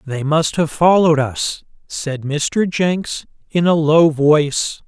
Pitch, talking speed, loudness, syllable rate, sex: 155 Hz, 150 wpm, -16 LUFS, 3.5 syllables/s, male